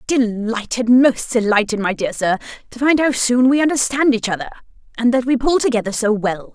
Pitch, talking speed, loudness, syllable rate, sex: 240 Hz, 185 wpm, -17 LUFS, 5.4 syllables/s, female